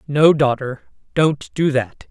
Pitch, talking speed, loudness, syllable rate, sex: 140 Hz, 140 wpm, -18 LUFS, 3.7 syllables/s, female